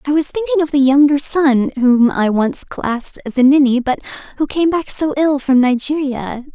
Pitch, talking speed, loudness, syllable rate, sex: 280 Hz, 200 wpm, -15 LUFS, 4.8 syllables/s, female